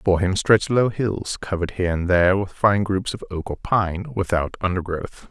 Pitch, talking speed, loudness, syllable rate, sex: 95 Hz, 205 wpm, -21 LUFS, 5.5 syllables/s, male